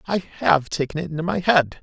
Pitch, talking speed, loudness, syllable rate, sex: 155 Hz, 230 wpm, -21 LUFS, 5.4 syllables/s, male